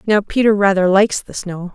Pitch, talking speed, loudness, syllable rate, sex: 200 Hz, 205 wpm, -15 LUFS, 5.6 syllables/s, female